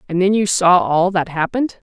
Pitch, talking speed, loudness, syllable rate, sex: 190 Hz, 220 wpm, -16 LUFS, 5.4 syllables/s, female